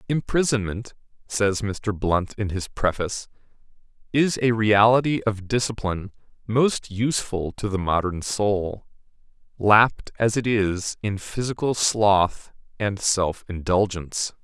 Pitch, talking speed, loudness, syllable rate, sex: 105 Hz, 115 wpm, -23 LUFS, 4.0 syllables/s, male